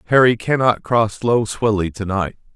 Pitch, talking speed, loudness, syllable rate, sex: 110 Hz, 165 wpm, -18 LUFS, 4.6 syllables/s, male